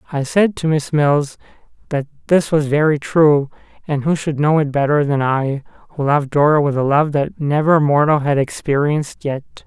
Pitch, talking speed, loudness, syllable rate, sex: 145 Hz, 185 wpm, -17 LUFS, 4.9 syllables/s, male